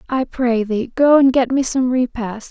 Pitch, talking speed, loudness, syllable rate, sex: 250 Hz, 215 wpm, -17 LUFS, 4.4 syllables/s, female